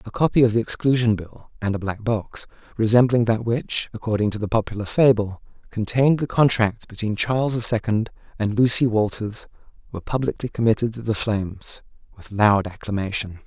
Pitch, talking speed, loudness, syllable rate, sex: 110 Hz, 165 wpm, -21 LUFS, 5.5 syllables/s, male